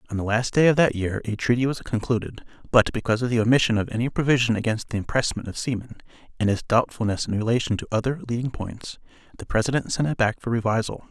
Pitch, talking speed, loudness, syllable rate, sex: 115 Hz, 215 wpm, -23 LUFS, 6.7 syllables/s, male